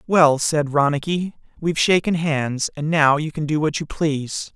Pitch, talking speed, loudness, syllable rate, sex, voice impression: 155 Hz, 185 wpm, -20 LUFS, 4.6 syllables/s, male, slightly masculine, slightly adult-like, slightly fluent, refreshing, slightly sincere, friendly